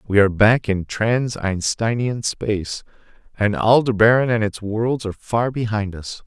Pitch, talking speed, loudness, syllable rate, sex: 110 Hz, 155 wpm, -19 LUFS, 4.5 syllables/s, male